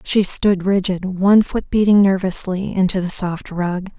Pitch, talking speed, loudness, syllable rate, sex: 190 Hz, 165 wpm, -17 LUFS, 4.4 syllables/s, female